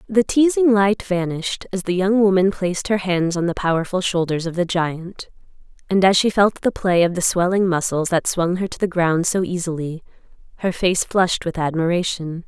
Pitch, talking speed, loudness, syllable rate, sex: 180 Hz, 195 wpm, -19 LUFS, 5.1 syllables/s, female